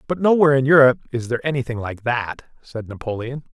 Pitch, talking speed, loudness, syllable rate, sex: 130 Hz, 185 wpm, -19 LUFS, 6.4 syllables/s, male